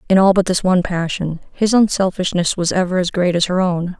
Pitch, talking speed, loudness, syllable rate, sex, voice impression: 180 Hz, 225 wpm, -17 LUFS, 5.7 syllables/s, female, very feminine, slightly adult-like, slightly thin, slightly weak, slightly dark, slightly hard, clear, fluent, cute, very intellectual, refreshing, sincere, calm, very friendly, reassuring, unique, very wild, very sweet, lively, light